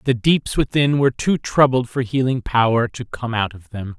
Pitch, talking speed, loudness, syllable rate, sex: 125 Hz, 210 wpm, -19 LUFS, 4.9 syllables/s, male